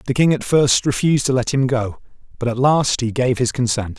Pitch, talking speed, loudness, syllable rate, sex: 130 Hz, 240 wpm, -18 LUFS, 5.4 syllables/s, male